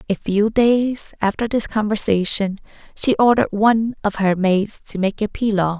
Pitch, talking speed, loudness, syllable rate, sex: 210 Hz, 165 wpm, -18 LUFS, 4.7 syllables/s, female